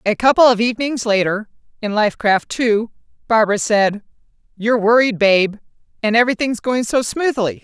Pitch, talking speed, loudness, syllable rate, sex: 225 Hz, 140 wpm, -16 LUFS, 5.5 syllables/s, female